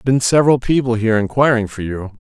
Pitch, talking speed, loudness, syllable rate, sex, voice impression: 120 Hz, 190 wpm, -16 LUFS, 6.3 syllables/s, male, masculine, adult-like, slightly thick, sincere, slightly calm, slightly kind